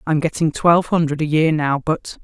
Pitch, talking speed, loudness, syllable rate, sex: 155 Hz, 215 wpm, -18 LUFS, 5.4 syllables/s, female